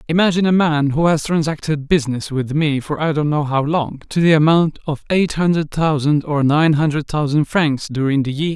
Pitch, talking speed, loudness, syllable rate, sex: 150 Hz, 210 wpm, -17 LUFS, 5.2 syllables/s, male